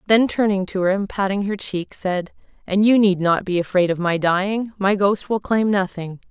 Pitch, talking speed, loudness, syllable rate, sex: 195 Hz, 220 wpm, -20 LUFS, 4.9 syllables/s, female